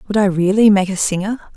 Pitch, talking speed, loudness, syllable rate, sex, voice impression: 200 Hz, 230 wpm, -15 LUFS, 6.5 syllables/s, female, very feminine, adult-like, slightly middle-aged, thin, slightly relaxed, slightly weak, slightly bright, soft, clear, slightly fluent, slightly raspy, slightly cute, intellectual, very refreshing, sincere, calm, slightly friendly, very reassuring, slightly unique, elegant, slightly sweet, slightly lively, kind, slightly sharp, modest